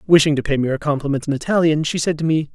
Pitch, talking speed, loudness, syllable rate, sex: 150 Hz, 285 wpm, -19 LUFS, 7.1 syllables/s, male